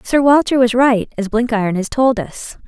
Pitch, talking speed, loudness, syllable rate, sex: 235 Hz, 200 wpm, -15 LUFS, 4.8 syllables/s, female